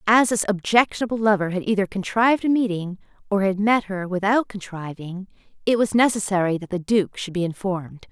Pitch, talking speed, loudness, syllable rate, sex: 200 Hz, 175 wpm, -22 LUFS, 5.7 syllables/s, female